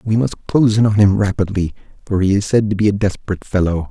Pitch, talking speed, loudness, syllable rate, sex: 100 Hz, 245 wpm, -16 LUFS, 6.6 syllables/s, male